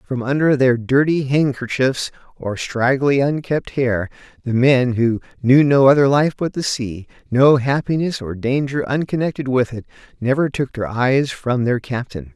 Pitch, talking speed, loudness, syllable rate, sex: 130 Hz, 160 wpm, -18 LUFS, 4.4 syllables/s, male